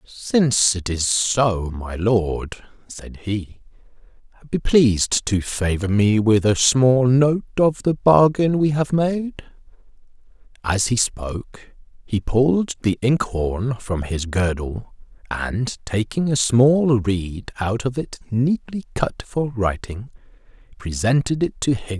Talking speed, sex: 145 wpm, male